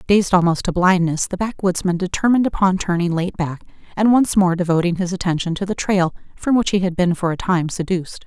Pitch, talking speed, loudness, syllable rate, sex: 180 Hz, 210 wpm, -19 LUFS, 5.8 syllables/s, female